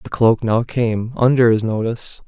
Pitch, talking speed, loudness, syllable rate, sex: 115 Hz, 185 wpm, -17 LUFS, 4.7 syllables/s, male